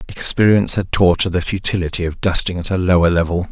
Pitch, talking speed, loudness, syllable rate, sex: 90 Hz, 205 wpm, -16 LUFS, 6.3 syllables/s, male